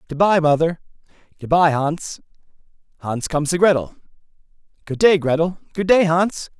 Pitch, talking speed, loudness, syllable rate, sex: 165 Hz, 125 wpm, -18 LUFS, 5.1 syllables/s, male